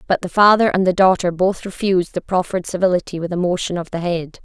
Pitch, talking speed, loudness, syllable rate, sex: 180 Hz, 230 wpm, -18 LUFS, 6.4 syllables/s, female